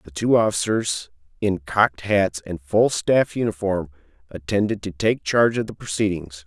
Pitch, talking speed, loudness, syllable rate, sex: 95 Hz, 160 wpm, -22 LUFS, 4.8 syllables/s, male